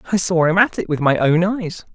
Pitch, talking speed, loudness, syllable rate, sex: 175 Hz, 275 wpm, -17 LUFS, 5.5 syllables/s, male